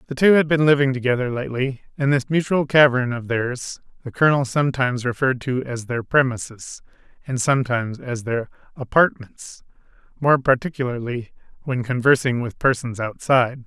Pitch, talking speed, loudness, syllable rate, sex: 130 Hz, 140 wpm, -20 LUFS, 5.6 syllables/s, male